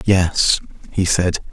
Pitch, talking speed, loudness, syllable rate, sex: 90 Hz, 120 wpm, -18 LUFS, 2.9 syllables/s, male